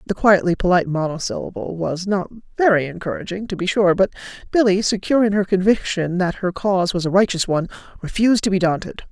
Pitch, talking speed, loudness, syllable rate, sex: 190 Hz, 185 wpm, -19 LUFS, 6.2 syllables/s, female